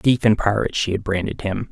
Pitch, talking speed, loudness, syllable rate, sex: 105 Hz, 245 wpm, -20 LUFS, 6.0 syllables/s, male